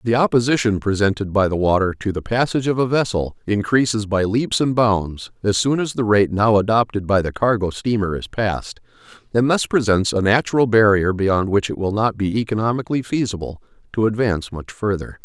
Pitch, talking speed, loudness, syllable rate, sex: 105 Hz, 190 wpm, -19 LUFS, 5.5 syllables/s, male